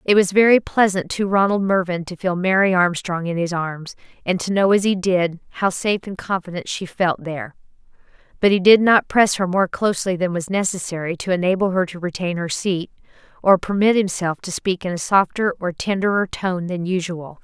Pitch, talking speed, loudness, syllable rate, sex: 185 Hz, 200 wpm, -19 LUFS, 5.3 syllables/s, female